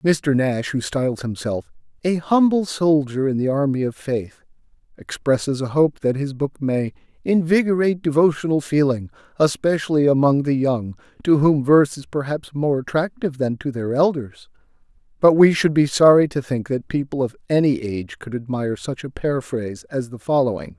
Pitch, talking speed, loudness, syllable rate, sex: 140 Hz, 165 wpm, -20 LUFS, 5.2 syllables/s, male